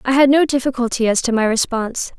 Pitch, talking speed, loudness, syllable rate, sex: 245 Hz, 220 wpm, -17 LUFS, 6.3 syllables/s, female